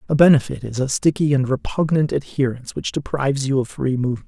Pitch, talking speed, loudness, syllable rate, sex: 140 Hz, 195 wpm, -20 LUFS, 6.4 syllables/s, male